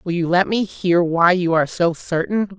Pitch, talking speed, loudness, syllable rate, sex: 175 Hz, 230 wpm, -18 LUFS, 4.9 syllables/s, female